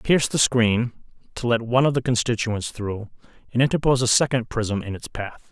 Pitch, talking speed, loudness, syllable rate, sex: 120 Hz, 195 wpm, -22 LUFS, 5.8 syllables/s, male